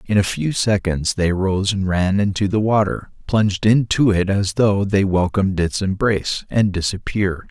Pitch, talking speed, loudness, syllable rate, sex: 100 Hz, 175 wpm, -18 LUFS, 4.7 syllables/s, male